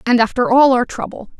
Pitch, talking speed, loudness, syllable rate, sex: 250 Hz, 215 wpm, -14 LUFS, 5.9 syllables/s, female